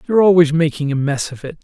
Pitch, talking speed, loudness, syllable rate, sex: 160 Hz, 260 wpm, -16 LUFS, 6.9 syllables/s, male